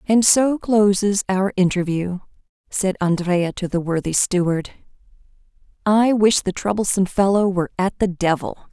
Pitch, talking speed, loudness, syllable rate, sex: 190 Hz, 140 wpm, -19 LUFS, 4.7 syllables/s, female